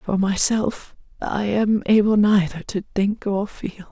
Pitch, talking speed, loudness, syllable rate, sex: 200 Hz, 155 wpm, -20 LUFS, 4.0 syllables/s, female